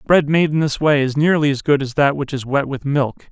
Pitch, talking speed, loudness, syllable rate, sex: 145 Hz, 290 wpm, -17 LUFS, 5.3 syllables/s, male